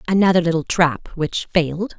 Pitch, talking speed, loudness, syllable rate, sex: 170 Hz, 150 wpm, -19 LUFS, 5.1 syllables/s, female